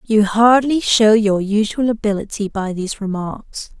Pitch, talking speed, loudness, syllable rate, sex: 215 Hz, 140 wpm, -16 LUFS, 4.4 syllables/s, female